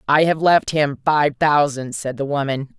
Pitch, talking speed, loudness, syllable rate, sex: 145 Hz, 195 wpm, -18 LUFS, 4.2 syllables/s, female